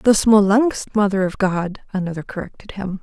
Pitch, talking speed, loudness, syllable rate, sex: 200 Hz, 160 wpm, -18 LUFS, 4.8 syllables/s, female